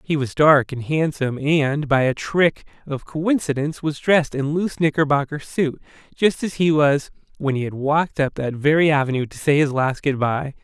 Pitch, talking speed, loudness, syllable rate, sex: 145 Hz, 195 wpm, -20 LUFS, 5.1 syllables/s, male